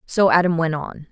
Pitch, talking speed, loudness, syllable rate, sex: 165 Hz, 215 wpm, -19 LUFS, 5.1 syllables/s, female